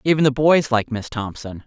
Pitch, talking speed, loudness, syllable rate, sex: 130 Hz, 215 wpm, -19 LUFS, 5.1 syllables/s, female